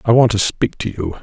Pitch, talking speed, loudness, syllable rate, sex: 105 Hz, 295 wpm, -17 LUFS, 5.5 syllables/s, male